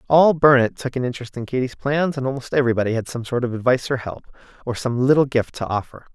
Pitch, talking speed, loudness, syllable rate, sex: 125 Hz, 235 wpm, -20 LUFS, 6.7 syllables/s, male